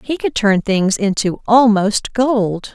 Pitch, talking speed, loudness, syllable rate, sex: 215 Hz, 155 wpm, -15 LUFS, 3.5 syllables/s, female